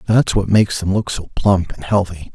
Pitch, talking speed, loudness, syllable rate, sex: 95 Hz, 230 wpm, -17 LUFS, 5.1 syllables/s, male